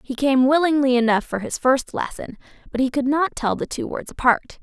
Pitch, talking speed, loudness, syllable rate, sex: 265 Hz, 220 wpm, -20 LUFS, 5.5 syllables/s, female